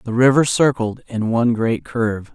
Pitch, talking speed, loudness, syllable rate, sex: 120 Hz, 180 wpm, -18 LUFS, 5.0 syllables/s, male